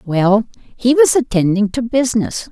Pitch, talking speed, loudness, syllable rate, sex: 230 Hz, 145 wpm, -15 LUFS, 4.5 syllables/s, female